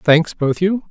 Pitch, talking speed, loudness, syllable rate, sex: 170 Hz, 200 wpm, -17 LUFS, 4.0 syllables/s, male